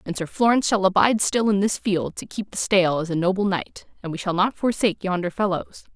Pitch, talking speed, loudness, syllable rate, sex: 190 Hz, 240 wpm, -22 LUFS, 6.1 syllables/s, female